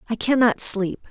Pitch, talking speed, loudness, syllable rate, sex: 225 Hz, 215 wpm, -18 LUFS, 4.4 syllables/s, female